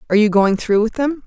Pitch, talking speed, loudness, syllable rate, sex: 225 Hz, 285 wpm, -16 LUFS, 6.5 syllables/s, female